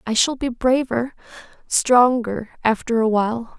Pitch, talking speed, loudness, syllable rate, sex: 235 Hz, 100 wpm, -19 LUFS, 4.3 syllables/s, female